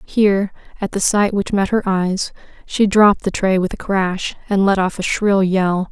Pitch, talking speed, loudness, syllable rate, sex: 195 Hz, 215 wpm, -17 LUFS, 4.6 syllables/s, female